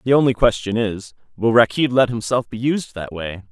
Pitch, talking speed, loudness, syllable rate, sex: 110 Hz, 205 wpm, -19 LUFS, 5.1 syllables/s, male